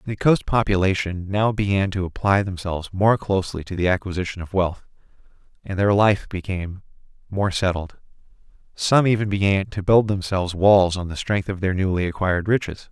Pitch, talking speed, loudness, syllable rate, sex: 95 Hz, 165 wpm, -21 LUFS, 5.5 syllables/s, male